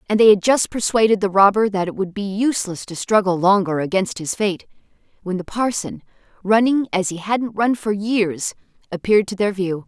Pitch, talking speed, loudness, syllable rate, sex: 200 Hz, 195 wpm, -19 LUFS, 5.2 syllables/s, female